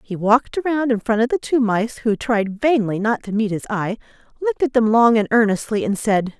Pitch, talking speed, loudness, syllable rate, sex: 230 Hz, 235 wpm, -19 LUFS, 5.5 syllables/s, female